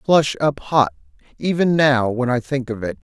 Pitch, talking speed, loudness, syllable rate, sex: 140 Hz, 210 wpm, -19 LUFS, 5.0 syllables/s, male